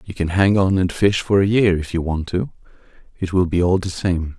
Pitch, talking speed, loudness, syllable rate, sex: 90 Hz, 260 wpm, -19 LUFS, 5.2 syllables/s, male